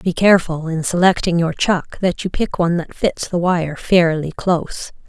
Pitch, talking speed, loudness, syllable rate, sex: 175 Hz, 190 wpm, -17 LUFS, 4.7 syllables/s, female